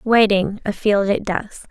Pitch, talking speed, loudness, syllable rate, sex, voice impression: 205 Hz, 140 wpm, -19 LUFS, 4.0 syllables/s, female, feminine, slightly young, slightly weak, slightly bright, clear, slightly halting, cute, calm, friendly, unique, slightly sweet, kind, slightly modest